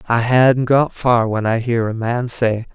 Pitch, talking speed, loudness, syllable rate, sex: 120 Hz, 220 wpm, -17 LUFS, 4.0 syllables/s, male